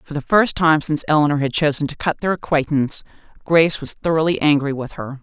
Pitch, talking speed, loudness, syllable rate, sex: 150 Hz, 205 wpm, -18 LUFS, 6.3 syllables/s, female